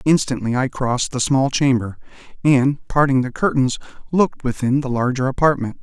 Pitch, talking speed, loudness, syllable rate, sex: 135 Hz, 155 wpm, -19 LUFS, 5.3 syllables/s, male